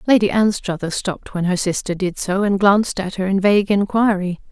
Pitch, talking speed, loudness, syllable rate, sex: 195 Hz, 200 wpm, -18 LUFS, 5.6 syllables/s, female